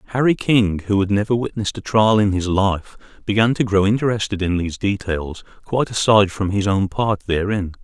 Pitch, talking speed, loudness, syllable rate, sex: 100 Hz, 190 wpm, -19 LUFS, 5.6 syllables/s, male